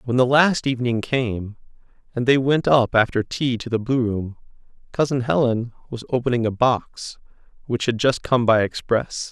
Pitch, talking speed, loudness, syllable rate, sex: 120 Hz, 175 wpm, -21 LUFS, 4.7 syllables/s, male